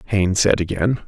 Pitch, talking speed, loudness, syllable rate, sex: 95 Hz, 165 wpm, -19 LUFS, 5.4 syllables/s, male